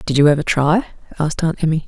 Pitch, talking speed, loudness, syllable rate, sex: 155 Hz, 225 wpm, -17 LUFS, 7.2 syllables/s, female